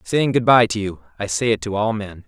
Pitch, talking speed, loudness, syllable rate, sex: 105 Hz, 290 wpm, -19 LUFS, 5.5 syllables/s, male